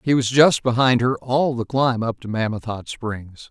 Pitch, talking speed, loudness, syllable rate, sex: 120 Hz, 225 wpm, -20 LUFS, 4.4 syllables/s, male